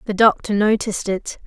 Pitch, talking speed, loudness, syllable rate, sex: 210 Hz, 165 wpm, -19 LUFS, 5.6 syllables/s, female